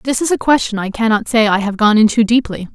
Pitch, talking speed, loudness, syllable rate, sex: 225 Hz, 260 wpm, -14 LUFS, 6.0 syllables/s, female